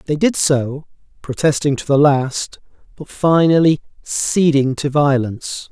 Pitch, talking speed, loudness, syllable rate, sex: 145 Hz, 125 wpm, -16 LUFS, 4.1 syllables/s, male